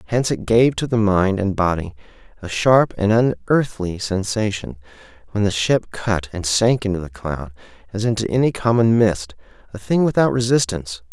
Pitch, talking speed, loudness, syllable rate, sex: 105 Hz, 165 wpm, -19 LUFS, 5.0 syllables/s, male